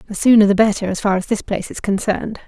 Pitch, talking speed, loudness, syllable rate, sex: 205 Hz, 265 wpm, -17 LUFS, 7.2 syllables/s, female